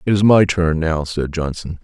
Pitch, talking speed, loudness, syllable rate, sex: 85 Hz, 230 wpm, -17 LUFS, 4.7 syllables/s, male